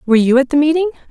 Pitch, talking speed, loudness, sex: 285 Hz, 270 wpm, -13 LUFS, female